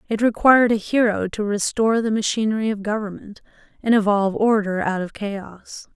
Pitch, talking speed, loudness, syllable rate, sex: 210 Hz, 160 wpm, -20 LUFS, 5.5 syllables/s, female